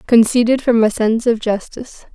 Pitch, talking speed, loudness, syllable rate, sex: 230 Hz, 170 wpm, -15 LUFS, 5.7 syllables/s, female